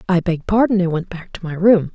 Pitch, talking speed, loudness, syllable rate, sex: 180 Hz, 280 wpm, -17 LUFS, 6.2 syllables/s, female